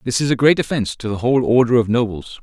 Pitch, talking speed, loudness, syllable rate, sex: 120 Hz, 270 wpm, -17 LUFS, 7.0 syllables/s, male